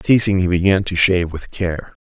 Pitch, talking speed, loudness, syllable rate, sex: 90 Hz, 205 wpm, -17 LUFS, 5.4 syllables/s, male